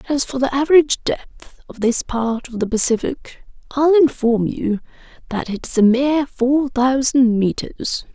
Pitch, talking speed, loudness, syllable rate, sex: 255 Hz, 155 wpm, -18 LUFS, 4.3 syllables/s, female